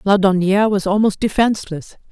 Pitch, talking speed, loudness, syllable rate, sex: 200 Hz, 115 wpm, -16 LUFS, 5.8 syllables/s, female